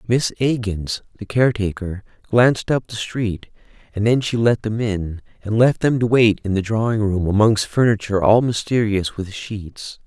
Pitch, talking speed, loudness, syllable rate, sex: 105 Hz, 175 wpm, -19 LUFS, 4.7 syllables/s, male